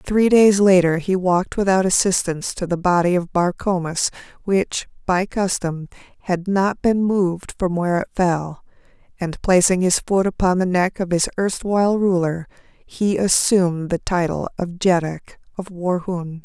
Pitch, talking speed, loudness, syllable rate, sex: 180 Hz, 155 wpm, -19 LUFS, 4.6 syllables/s, female